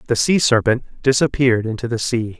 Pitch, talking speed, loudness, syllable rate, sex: 120 Hz, 175 wpm, -18 LUFS, 5.4 syllables/s, male